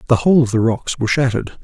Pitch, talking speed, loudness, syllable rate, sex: 125 Hz, 255 wpm, -16 LUFS, 7.8 syllables/s, male